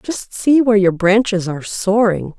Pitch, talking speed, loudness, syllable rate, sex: 205 Hz, 175 wpm, -15 LUFS, 4.7 syllables/s, female